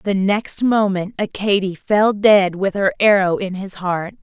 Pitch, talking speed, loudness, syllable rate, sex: 195 Hz, 170 wpm, -17 LUFS, 4.0 syllables/s, female